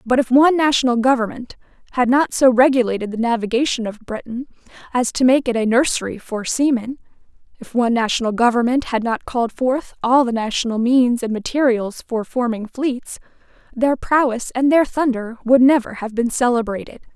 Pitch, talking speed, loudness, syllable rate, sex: 245 Hz, 165 wpm, -18 LUFS, 5.4 syllables/s, female